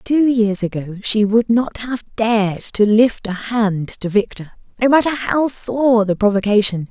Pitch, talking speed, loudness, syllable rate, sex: 220 Hz, 175 wpm, -17 LUFS, 4.1 syllables/s, female